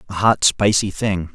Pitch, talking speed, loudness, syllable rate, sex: 100 Hz, 180 wpm, -17 LUFS, 4.4 syllables/s, male